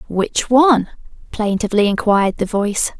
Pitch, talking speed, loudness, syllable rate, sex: 215 Hz, 120 wpm, -16 LUFS, 5.5 syllables/s, female